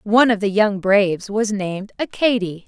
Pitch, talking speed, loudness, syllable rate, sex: 210 Hz, 180 wpm, -19 LUFS, 5.2 syllables/s, female